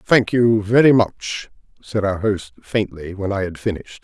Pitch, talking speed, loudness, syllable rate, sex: 105 Hz, 180 wpm, -19 LUFS, 4.6 syllables/s, male